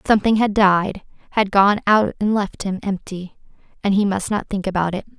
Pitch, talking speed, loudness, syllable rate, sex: 200 Hz, 195 wpm, -19 LUFS, 5.2 syllables/s, female